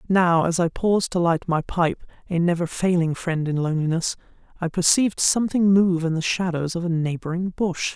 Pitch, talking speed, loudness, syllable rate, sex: 175 Hz, 175 wpm, -22 LUFS, 5.3 syllables/s, female